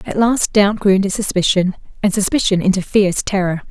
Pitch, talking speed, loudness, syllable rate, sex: 195 Hz, 180 wpm, -16 LUFS, 5.9 syllables/s, female